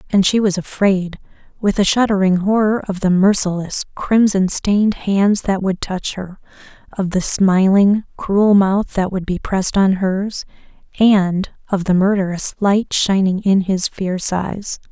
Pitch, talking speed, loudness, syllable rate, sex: 195 Hz, 155 wpm, -16 LUFS, 4.1 syllables/s, female